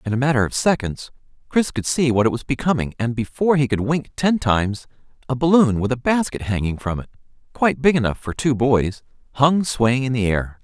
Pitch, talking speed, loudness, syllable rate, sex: 130 Hz, 215 wpm, -20 LUFS, 5.6 syllables/s, male